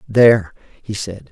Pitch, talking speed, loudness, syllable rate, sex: 105 Hz, 135 wpm, -16 LUFS, 4.0 syllables/s, male